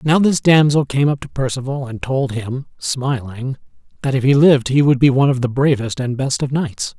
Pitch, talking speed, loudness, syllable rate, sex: 135 Hz, 225 wpm, -17 LUFS, 5.2 syllables/s, male